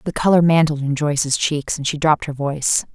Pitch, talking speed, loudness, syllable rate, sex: 150 Hz, 225 wpm, -18 LUFS, 5.8 syllables/s, female